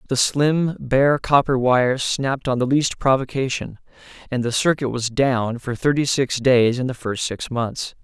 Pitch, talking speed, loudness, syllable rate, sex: 130 Hz, 180 wpm, -20 LUFS, 4.3 syllables/s, male